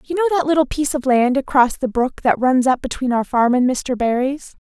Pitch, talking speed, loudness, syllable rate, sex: 265 Hz, 245 wpm, -18 LUFS, 5.5 syllables/s, female